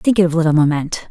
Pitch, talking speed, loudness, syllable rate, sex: 165 Hz, 325 wpm, -15 LUFS, 8.1 syllables/s, female